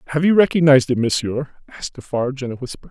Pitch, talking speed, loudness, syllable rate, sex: 135 Hz, 205 wpm, -18 LUFS, 7.4 syllables/s, male